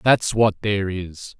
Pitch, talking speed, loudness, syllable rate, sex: 100 Hz, 170 wpm, -21 LUFS, 4.2 syllables/s, male